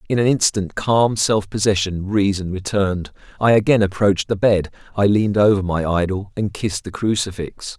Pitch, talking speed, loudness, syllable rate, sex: 100 Hz, 170 wpm, -19 LUFS, 5.3 syllables/s, male